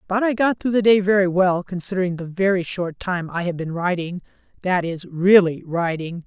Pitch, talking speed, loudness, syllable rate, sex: 180 Hz, 190 wpm, -20 LUFS, 5.1 syllables/s, female